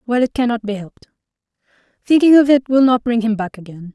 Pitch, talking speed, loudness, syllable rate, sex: 235 Hz, 215 wpm, -15 LUFS, 6.4 syllables/s, female